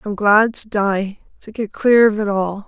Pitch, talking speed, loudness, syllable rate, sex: 210 Hz, 200 wpm, -17 LUFS, 4.1 syllables/s, female